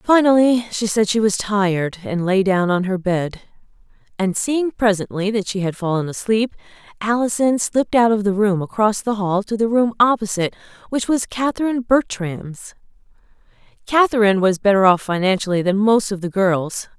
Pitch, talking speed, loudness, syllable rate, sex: 205 Hz, 165 wpm, -18 LUFS, 5.1 syllables/s, female